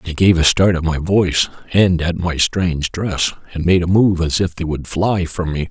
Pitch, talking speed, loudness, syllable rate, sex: 85 Hz, 240 wpm, -17 LUFS, 4.8 syllables/s, male